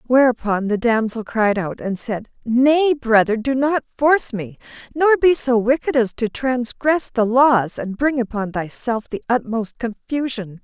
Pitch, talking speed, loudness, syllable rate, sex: 240 Hz, 165 wpm, -19 LUFS, 4.2 syllables/s, female